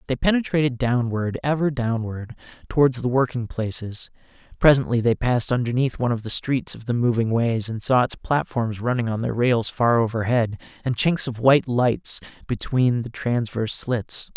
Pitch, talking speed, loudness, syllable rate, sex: 120 Hz, 165 wpm, -22 LUFS, 5.0 syllables/s, male